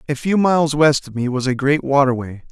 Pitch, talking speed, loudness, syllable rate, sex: 140 Hz, 240 wpm, -17 LUFS, 5.7 syllables/s, male